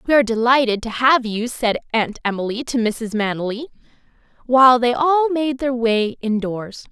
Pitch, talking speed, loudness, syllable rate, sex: 240 Hz, 165 wpm, -18 LUFS, 5.0 syllables/s, female